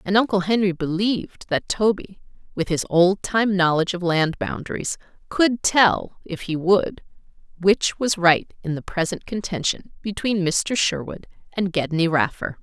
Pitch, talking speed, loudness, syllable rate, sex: 185 Hz, 150 wpm, -21 LUFS, 4.5 syllables/s, female